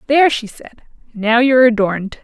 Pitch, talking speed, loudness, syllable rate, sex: 235 Hz, 160 wpm, -14 LUFS, 5.8 syllables/s, female